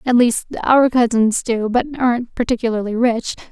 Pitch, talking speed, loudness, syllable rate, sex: 235 Hz, 155 wpm, -17 LUFS, 5.0 syllables/s, female